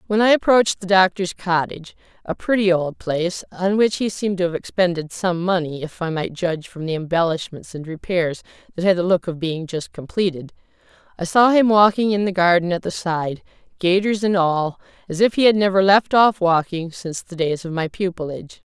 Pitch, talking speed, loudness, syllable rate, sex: 180 Hz, 195 wpm, -19 LUFS, 5.5 syllables/s, female